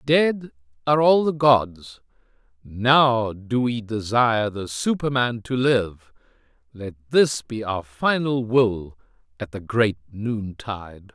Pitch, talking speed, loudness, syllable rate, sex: 115 Hz, 120 wpm, -21 LUFS, 3.5 syllables/s, male